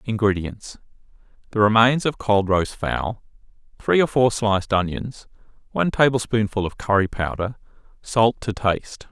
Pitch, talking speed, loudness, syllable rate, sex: 110 Hz, 125 wpm, -21 LUFS, 4.7 syllables/s, male